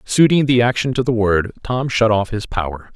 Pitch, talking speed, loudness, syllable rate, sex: 115 Hz, 225 wpm, -17 LUFS, 5.1 syllables/s, male